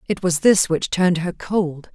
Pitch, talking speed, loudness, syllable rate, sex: 175 Hz, 215 wpm, -19 LUFS, 4.4 syllables/s, female